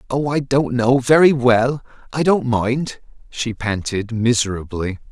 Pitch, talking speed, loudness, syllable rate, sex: 125 Hz, 130 wpm, -18 LUFS, 4.0 syllables/s, male